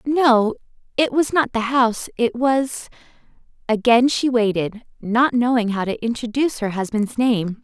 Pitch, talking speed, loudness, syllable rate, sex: 240 Hz, 140 wpm, -19 LUFS, 4.5 syllables/s, female